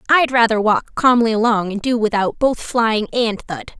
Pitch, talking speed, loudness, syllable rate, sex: 225 Hz, 190 wpm, -17 LUFS, 4.6 syllables/s, female